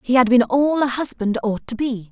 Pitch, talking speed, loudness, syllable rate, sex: 245 Hz, 255 wpm, -19 LUFS, 5.1 syllables/s, female